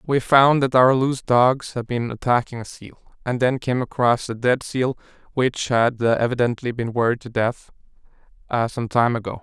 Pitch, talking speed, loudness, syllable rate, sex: 125 Hz, 180 wpm, -20 LUFS, 4.8 syllables/s, male